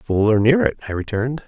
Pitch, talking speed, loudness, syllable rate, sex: 120 Hz, 245 wpm, -19 LUFS, 5.9 syllables/s, male